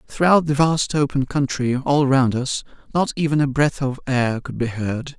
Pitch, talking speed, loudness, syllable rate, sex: 135 Hz, 195 wpm, -20 LUFS, 4.6 syllables/s, male